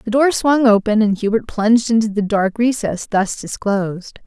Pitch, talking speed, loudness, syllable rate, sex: 220 Hz, 185 wpm, -17 LUFS, 4.8 syllables/s, female